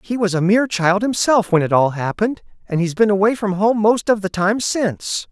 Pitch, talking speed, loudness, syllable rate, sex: 200 Hz, 235 wpm, -17 LUFS, 5.4 syllables/s, male